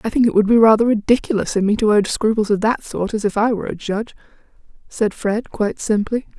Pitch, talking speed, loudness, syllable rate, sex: 215 Hz, 235 wpm, -18 LUFS, 6.4 syllables/s, female